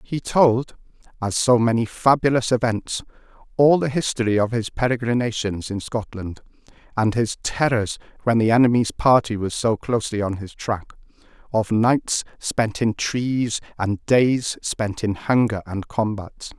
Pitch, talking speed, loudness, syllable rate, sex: 115 Hz, 145 wpm, -21 LUFS, 4.3 syllables/s, male